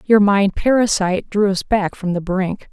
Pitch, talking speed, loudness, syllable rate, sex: 200 Hz, 200 wpm, -17 LUFS, 4.7 syllables/s, female